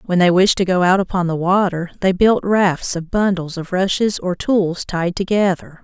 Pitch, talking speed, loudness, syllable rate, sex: 185 Hz, 205 wpm, -17 LUFS, 4.7 syllables/s, female